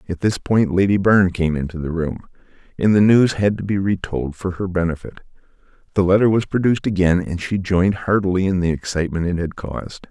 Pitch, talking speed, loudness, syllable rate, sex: 95 Hz, 200 wpm, -19 LUFS, 5.9 syllables/s, male